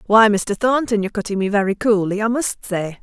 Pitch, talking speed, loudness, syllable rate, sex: 210 Hz, 220 wpm, -18 LUFS, 5.6 syllables/s, female